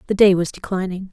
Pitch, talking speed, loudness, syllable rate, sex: 190 Hz, 215 wpm, -19 LUFS, 6.5 syllables/s, female